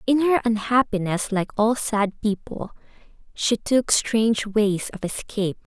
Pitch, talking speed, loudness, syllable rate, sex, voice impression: 220 Hz, 135 wpm, -22 LUFS, 4.2 syllables/s, female, feminine, slightly adult-like, slightly soft, slightly cute, slightly calm, friendly